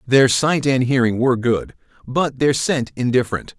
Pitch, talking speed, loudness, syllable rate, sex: 130 Hz, 165 wpm, -18 LUFS, 4.8 syllables/s, male